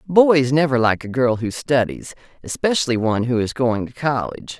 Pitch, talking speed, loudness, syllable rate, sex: 130 Hz, 185 wpm, -19 LUFS, 5.3 syllables/s, female